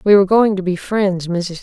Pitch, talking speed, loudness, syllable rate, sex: 190 Hz, 220 wpm, -16 LUFS, 5.2 syllables/s, female